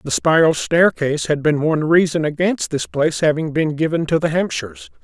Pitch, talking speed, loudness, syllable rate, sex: 160 Hz, 190 wpm, -17 LUFS, 5.6 syllables/s, male